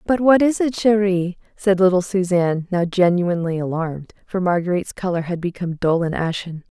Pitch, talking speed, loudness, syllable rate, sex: 180 Hz, 170 wpm, -19 LUFS, 5.6 syllables/s, female